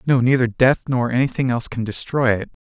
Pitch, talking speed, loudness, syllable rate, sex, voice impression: 125 Hz, 205 wpm, -19 LUFS, 6.0 syllables/s, male, masculine, adult-like, thick, tensed, slightly powerful, slightly bright, slightly soft, clear, slightly halting, cool, very intellectual, refreshing, sincere, calm, slightly mature, friendly, reassuring, unique, elegant, wild, slightly sweet, lively, kind, modest